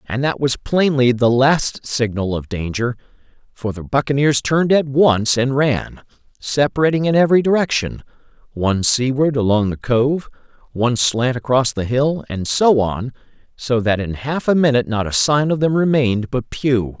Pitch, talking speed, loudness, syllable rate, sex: 130 Hz, 170 wpm, -17 LUFS, 4.8 syllables/s, male